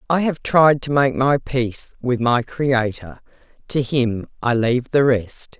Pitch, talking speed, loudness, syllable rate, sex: 125 Hz, 170 wpm, -19 LUFS, 4.0 syllables/s, female